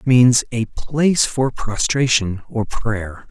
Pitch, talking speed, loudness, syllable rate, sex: 120 Hz, 145 wpm, -18 LUFS, 3.5 syllables/s, male